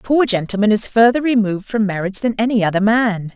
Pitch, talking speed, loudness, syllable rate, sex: 215 Hz, 215 wpm, -16 LUFS, 6.3 syllables/s, female